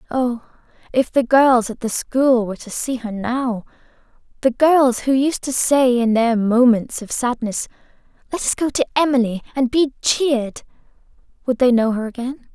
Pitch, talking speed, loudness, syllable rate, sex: 250 Hz, 165 wpm, -18 LUFS, 4.6 syllables/s, female